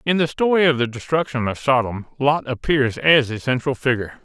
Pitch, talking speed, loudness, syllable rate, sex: 135 Hz, 200 wpm, -19 LUFS, 5.6 syllables/s, male